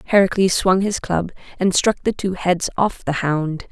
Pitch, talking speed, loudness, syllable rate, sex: 185 Hz, 195 wpm, -19 LUFS, 4.4 syllables/s, female